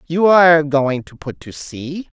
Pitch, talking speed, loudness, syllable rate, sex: 155 Hz, 190 wpm, -14 LUFS, 4.1 syllables/s, female